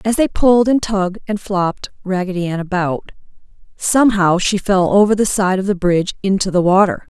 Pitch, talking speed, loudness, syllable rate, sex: 195 Hz, 185 wpm, -16 LUFS, 5.5 syllables/s, female